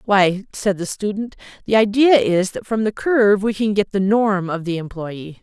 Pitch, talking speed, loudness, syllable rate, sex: 200 Hz, 210 wpm, -18 LUFS, 4.7 syllables/s, female